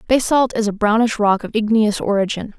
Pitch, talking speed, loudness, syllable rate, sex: 220 Hz, 185 wpm, -17 LUFS, 5.5 syllables/s, female